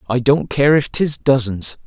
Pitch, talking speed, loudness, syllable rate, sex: 130 Hz, 195 wpm, -16 LUFS, 4.3 syllables/s, male